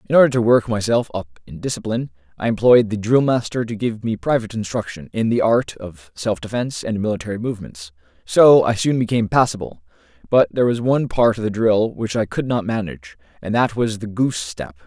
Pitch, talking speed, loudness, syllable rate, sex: 110 Hz, 200 wpm, -19 LUFS, 6.0 syllables/s, male